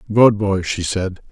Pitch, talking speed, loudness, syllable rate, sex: 95 Hz, 185 wpm, -17 LUFS, 4.2 syllables/s, male